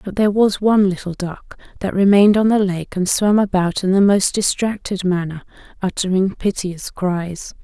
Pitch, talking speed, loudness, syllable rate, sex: 190 Hz, 175 wpm, -17 LUFS, 5.0 syllables/s, female